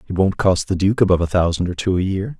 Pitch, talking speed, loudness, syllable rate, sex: 95 Hz, 300 wpm, -18 LUFS, 6.7 syllables/s, male